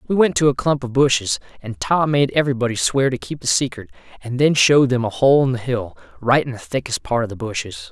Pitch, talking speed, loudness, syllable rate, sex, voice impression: 130 Hz, 250 wpm, -19 LUFS, 5.9 syllables/s, male, masculine, slightly young, slightly adult-like, slightly thick, slightly tensed, slightly powerful, bright, slightly soft, clear, fluent, slightly raspy, cool, slightly intellectual, very refreshing, very sincere, slightly calm, very friendly, slightly reassuring, slightly unique, wild, slightly sweet, very lively, kind, slightly intense, light